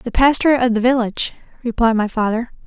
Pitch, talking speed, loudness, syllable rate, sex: 235 Hz, 180 wpm, -17 LUFS, 5.8 syllables/s, female